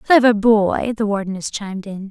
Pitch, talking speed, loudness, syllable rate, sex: 210 Hz, 170 wpm, -18 LUFS, 5.2 syllables/s, female